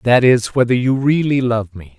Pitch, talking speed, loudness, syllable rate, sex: 120 Hz, 210 wpm, -15 LUFS, 4.8 syllables/s, male